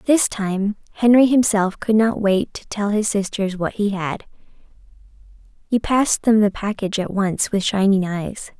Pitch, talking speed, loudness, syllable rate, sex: 205 Hz, 170 wpm, -19 LUFS, 4.6 syllables/s, female